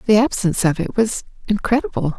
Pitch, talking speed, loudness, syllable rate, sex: 205 Hz, 165 wpm, -19 LUFS, 6.2 syllables/s, female